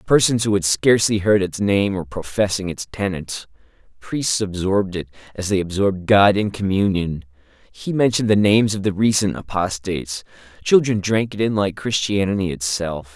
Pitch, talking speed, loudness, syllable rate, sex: 100 Hz, 150 wpm, -19 LUFS, 5.3 syllables/s, male